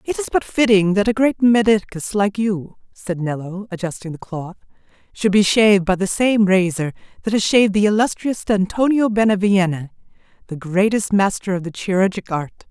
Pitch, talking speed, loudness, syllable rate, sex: 200 Hz, 170 wpm, -18 LUFS, 5.2 syllables/s, female